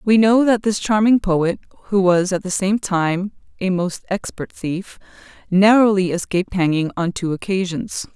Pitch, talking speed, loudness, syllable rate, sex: 190 Hz, 160 wpm, -18 LUFS, 4.5 syllables/s, female